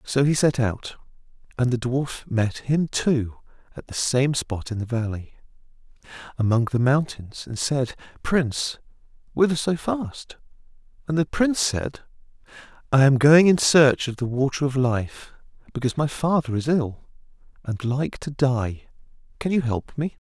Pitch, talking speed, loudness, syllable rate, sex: 135 Hz, 155 wpm, -22 LUFS, 4.5 syllables/s, male